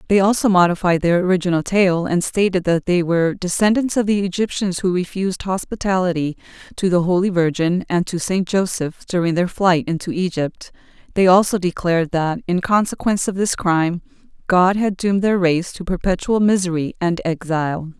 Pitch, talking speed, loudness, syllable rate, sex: 180 Hz, 165 wpm, -18 LUFS, 5.4 syllables/s, female